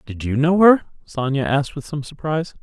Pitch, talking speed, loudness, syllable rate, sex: 145 Hz, 205 wpm, -19 LUFS, 5.8 syllables/s, male